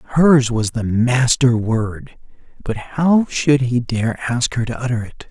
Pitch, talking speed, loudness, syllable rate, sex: 125 Hz, 170 wpm, -17 LUFS, 3.8 syllables/s, male